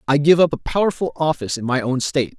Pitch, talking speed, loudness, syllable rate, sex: 145 Hz, 250 wpm, -19 LUFS, 6.8 syllables/s, male